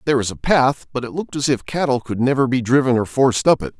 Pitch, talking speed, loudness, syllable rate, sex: 130 Hz, 285 wpm, -18 LUFS, 6.7 syllables/s, male